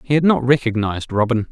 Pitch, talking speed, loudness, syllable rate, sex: 125 Hz, 200 wpm, -18 LUFS, 6.4 syllables/s, male